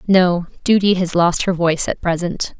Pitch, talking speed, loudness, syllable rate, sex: 180 Hz, 185 wpm, -17 LUFS, 4.9 syllables/s, female